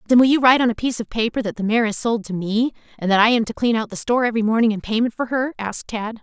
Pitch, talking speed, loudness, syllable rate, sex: 225 Hz, 320 wpm, -19 LUFS, 7.3 syllables/s, female